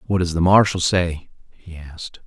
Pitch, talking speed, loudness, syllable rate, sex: 85 Hz, 185 wpm, -18 LUFS, 5.1 syllables/s, male